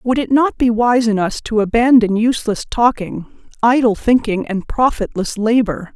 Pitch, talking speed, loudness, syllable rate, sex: 230 Hz, 160 wpm, -15 LUFS, 4.6 syllables/s, female